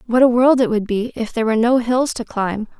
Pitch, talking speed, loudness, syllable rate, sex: 235 Hz, 280 wpm, -17 LUFS, 5.9 syllables/s, female